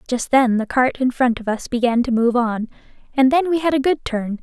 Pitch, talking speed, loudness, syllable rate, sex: 250 Hz, 260 wpm, -18 LUFS, 5.3 syllables/s, female